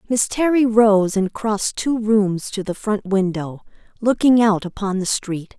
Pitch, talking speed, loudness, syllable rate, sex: 210 Hz, 170 wpm, -19 LUFS, 4.2 syllables/s, female